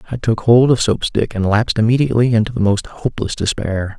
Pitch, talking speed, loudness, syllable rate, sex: 115 Hz, 210 wpm, -16 LUFS, 6.1 syllables/s, male